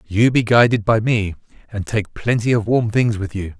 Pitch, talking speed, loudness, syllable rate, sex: 110 Hz, 215 wpm, -18 LUFS, 4.8 syllables/s, male